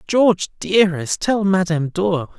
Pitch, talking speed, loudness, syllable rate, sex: 185 Hz, 125 wpm, -18 LUFS, 4.8 syllables/s, male